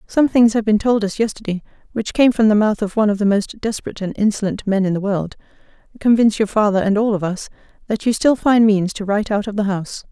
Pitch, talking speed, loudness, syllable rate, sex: 210 Hz, 250 wpm, -17 LUFS, 6.4 syllables/s, female